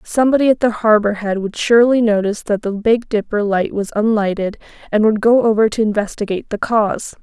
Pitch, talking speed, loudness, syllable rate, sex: 215 Hz, 190 wpm, -16 LUFS, 6.0 syllables/s, female